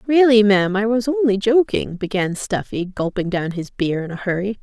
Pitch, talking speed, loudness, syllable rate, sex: 205 Hz, 195 wpm, -19 LUFS, 5.2 syllables/s, female